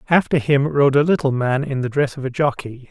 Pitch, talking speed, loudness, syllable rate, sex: 135 Hz, 250 wpm, -18 LUFS, 5.5 syllables/s, male